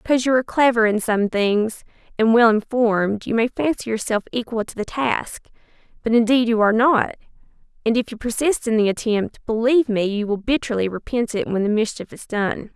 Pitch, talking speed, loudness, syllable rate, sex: 230 Hz, 200 wpm, -20 LUFS, 5.5 syllables/s, female